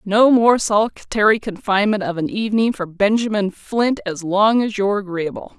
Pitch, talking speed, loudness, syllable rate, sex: 205 Hz, 170 wpm, -18 LUFS, 5.3 syllables/s, female